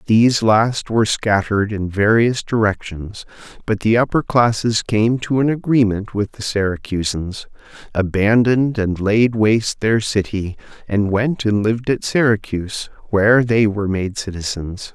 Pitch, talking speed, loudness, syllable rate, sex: 110 Hz, 140 wpm, -17 LUFS, 4.6 syllables/s, male